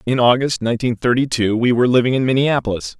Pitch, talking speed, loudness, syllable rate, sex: 120 Hz, 200 wpm, -17 LUFS, 6.6 syllables/s, male